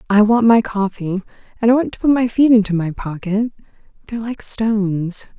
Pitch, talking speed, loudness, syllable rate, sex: 215 Hz, 180 wpm, -17 LUFS, 5.3 syllables/s, female